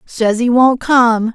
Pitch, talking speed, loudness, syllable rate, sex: 240 Hz, 180 wpm, -12 LUFS, 3.3 syllables/s, female